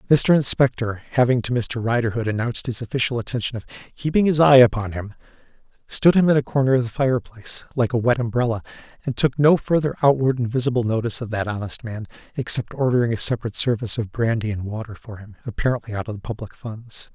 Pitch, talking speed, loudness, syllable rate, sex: 120 Hz, 200 wpm, -21 LUFS, 6.5 syllables/s, male